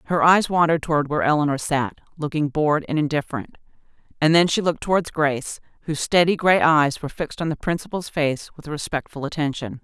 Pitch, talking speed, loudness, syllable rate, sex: 150 Hz, 185 wpm, -21 LUFS, 6.4 syllables/s, female